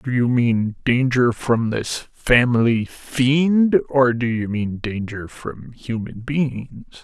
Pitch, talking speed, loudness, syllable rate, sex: 120 Hz, 135 wpm, -20 LUFS, 3.1 syllables/s, male